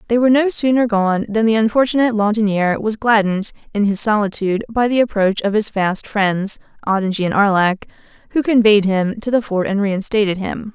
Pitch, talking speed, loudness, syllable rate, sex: 210 Hz, 185 wpm, -17 LUFS, 5.7 syllables/s, female